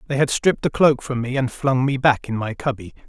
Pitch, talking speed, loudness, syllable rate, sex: 130 Hz, 275 wpm, -20 LUFS, 5.8 syllables/s, male